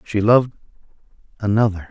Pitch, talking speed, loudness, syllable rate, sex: 105 Hz, 95 wpm, -18 LUFS, 6.3 syllables/s, male